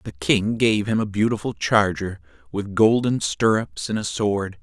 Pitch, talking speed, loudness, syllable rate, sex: 105 Hz, 170 wpm, -21 LUFS, 4.3 syllables/s, male